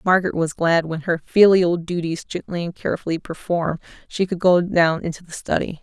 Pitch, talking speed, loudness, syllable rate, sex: 170 Hz, 185 wpm, -20 LUFS, 5.5 syllables/s, female